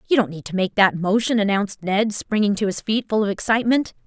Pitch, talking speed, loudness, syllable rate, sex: 205 Hz, 235 wpm, -20 LUFS, 6.2 syllables/s, female